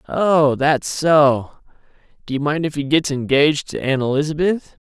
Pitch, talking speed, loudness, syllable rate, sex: 145 Hz, 150 wpm, -18 LUFS, 4.6 syllables/s, male